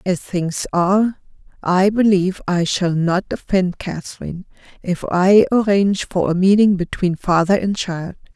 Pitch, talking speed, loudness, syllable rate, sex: 185 Hz, 145 wpm, -17 LUFS, 4.5 syllables/s, female